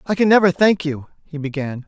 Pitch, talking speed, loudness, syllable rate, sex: 165 Hz, 225 wpm, -17 LUFS, 5.7 syllables/s, male